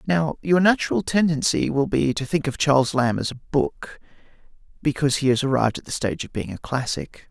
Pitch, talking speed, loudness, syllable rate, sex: 145 Hz, 205 wpm, -22 LUFS, 5.7 syllables/s, male